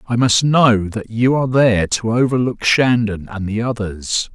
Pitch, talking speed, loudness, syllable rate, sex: 115 Hz, 180 wpm, -16 LUFS, 4.6 syllables/s, male